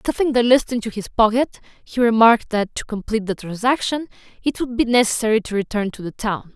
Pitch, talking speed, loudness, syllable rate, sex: 225 Hz, 200 wpm, -19 LUFS, 6.0 syllables/s, female